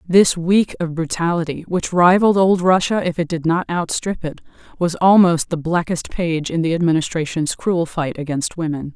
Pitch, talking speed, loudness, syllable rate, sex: 170 Hz, 175 wpm, -18 LUFS, 4.9 syllables/s, female